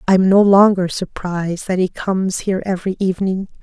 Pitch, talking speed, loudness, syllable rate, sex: 190 Hz, 165 wpm, -17 LUFS, 5.6 syllables/s, female